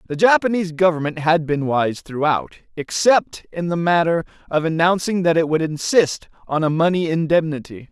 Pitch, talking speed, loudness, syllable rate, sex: 165 Hz, 160 wpm, -19 LUFS, 5.1 syllables/s, male